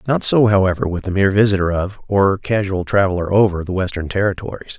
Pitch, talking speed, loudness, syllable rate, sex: 100 Hz, 190 wpm, -17 LUFS, 6.1 syllables/s, male